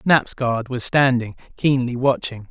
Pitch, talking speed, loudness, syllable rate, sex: 125 Hz, 145 wpm, -20 LUFS, 4.0 syllables/s, male